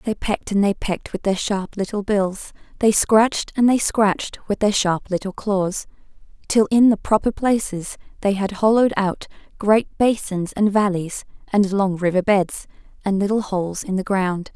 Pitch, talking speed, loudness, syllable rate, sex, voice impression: 200 Hz, 175 wpm, -20 LUFS, 4.7 syllables/s, female, feminine, adult-like, clear, fluent, raspy, calm, elegant, slightly strict, sharp